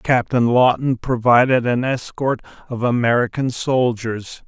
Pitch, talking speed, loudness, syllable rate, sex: 125 Hz, 105 wpm, -18 LUFS, 4.1 syllables/s, male